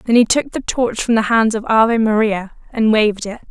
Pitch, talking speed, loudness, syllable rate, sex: 225 Hz, 240 wpm, -16 LUFS, 5.5 syllables/s, female